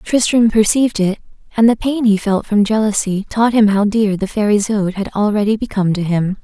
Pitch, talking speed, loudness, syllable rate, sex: 210 Hz, 205 wpm, -15 LUFS, 5.5 syllables/s, female